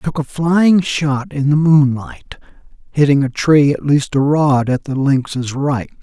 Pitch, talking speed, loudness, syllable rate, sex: 145 Hz, 190 wpm, -15 LUFS, 4.2 syllables/s, male